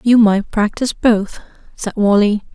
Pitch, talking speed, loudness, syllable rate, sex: 215 Hz, 140 wpm, -15 LUFS, 4.5 syllables/s, female